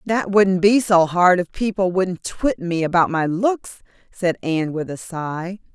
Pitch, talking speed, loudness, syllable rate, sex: 185 Hz, 190 wpm, -19 LUFS, 4.2 syllables/s, female